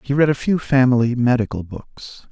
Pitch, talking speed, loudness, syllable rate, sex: 125 Hz, 180 wpm, -18 LUFS, 5.1 syllables/s, male